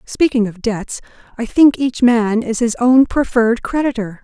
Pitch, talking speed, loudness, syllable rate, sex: 235 Hz, 170 wpm, -15 LUFS, 4.6 syllables/s, female